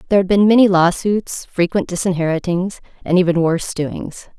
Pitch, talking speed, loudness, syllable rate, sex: 180 Hz, 150 wpm, -16 LUFS, 5.5 syllables/s, female